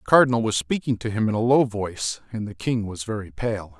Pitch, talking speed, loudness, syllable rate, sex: 110 Hz, 255 wpm, -23 LUFS, 5.9 syllables/s, male